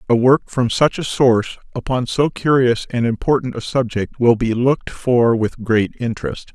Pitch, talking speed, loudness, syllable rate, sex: 125 Hz, 185 wpm, -17 LUFS, 4.9 syllables/s, male